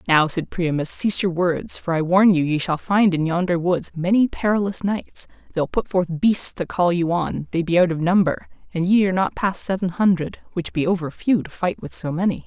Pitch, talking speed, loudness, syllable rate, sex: 180 Hz, 235 wpm, -21 LUFS, 5.3 syllables/s, female